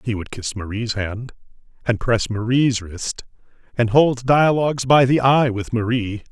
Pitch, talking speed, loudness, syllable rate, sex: 120 Hz, 160 wpm, -19 LUFS, 4.3 syllables/s, male